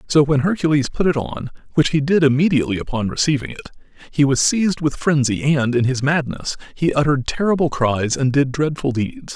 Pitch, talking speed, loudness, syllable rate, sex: 145 Hz, 190 wpm, -18 LUFS, 5.7 syllables/s, male